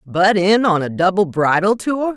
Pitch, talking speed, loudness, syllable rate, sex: 195 Hz, 195 wpm, -16 LUFS, 4.4 syllables/s, female